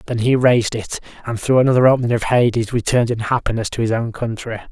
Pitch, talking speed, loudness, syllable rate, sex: 115 Hz, 215 wpm, -17 LUFS, 6.7 syllables/s, male